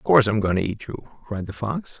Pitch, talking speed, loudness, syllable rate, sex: 100 Hz, 300 wpm, -24 LUFS, 6.3 syllables/s, male